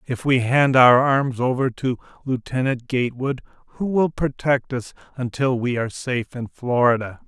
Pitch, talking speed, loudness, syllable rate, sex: 130 Hz, 155 wpm, -21 LUFS, 4.8 syllables/s, male